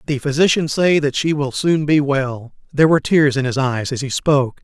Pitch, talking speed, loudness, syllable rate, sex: 145 Hz, 235 wpm, -17 LUFS, 5.4 syllables/s, male